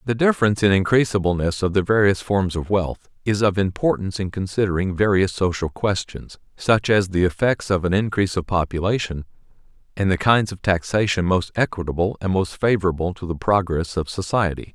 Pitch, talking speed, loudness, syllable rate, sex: 95 Hz, 170 wpm, -21 LUFS, 5.6 syllables/s, male